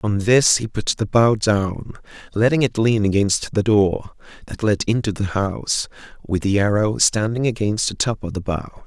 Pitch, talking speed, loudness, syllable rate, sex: 105 Hz, 190 wpm, -19 LUFS, 4.0 syllables/s, male